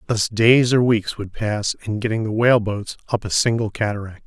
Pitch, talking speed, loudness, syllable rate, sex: 110 Hz, 210 wpm, -19 LUFS, 5.1 syllables/s, male